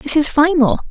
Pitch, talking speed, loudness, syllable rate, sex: 295 Hz, 200 wpm, -14 LUFS, 5.2 syllables/s, female